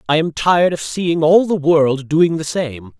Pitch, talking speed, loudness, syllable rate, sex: 160 Hz, 220 wpm, -16 LUFS, 4.3 syllables/s, male